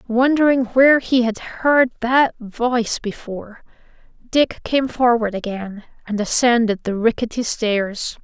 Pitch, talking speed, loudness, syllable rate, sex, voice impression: 235 Hz, 125 wpm, -18 LUFS, 4.1 syllables/s, female, feminine, slightly young, relaxed, bright, raspy, slightly cute, slightly calm, friendly, unique, slightly sharp, modest